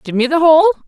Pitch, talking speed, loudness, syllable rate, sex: 305 Hz, 275 wpm, -12 LUFS, 7.0 syllables/s, female